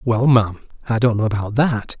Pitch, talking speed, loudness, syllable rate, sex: 115 Hz, 210 wpm, -18 LUFS, 5.4 syllables/s, male